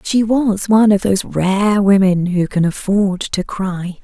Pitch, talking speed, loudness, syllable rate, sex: 195 Hz, 180 wpm, -15 LUFS, 4.1 syllables/s, female